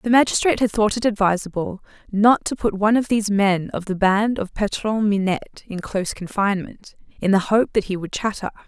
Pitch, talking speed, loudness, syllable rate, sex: 205 Hz, 200 wpm, -20 LUFS, 5.7 syllables/s, female